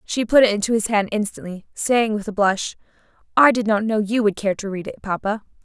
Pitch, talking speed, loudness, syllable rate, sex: 210 Hz, 235 wpm, -20 LUFS, 5.6 syllables/s, female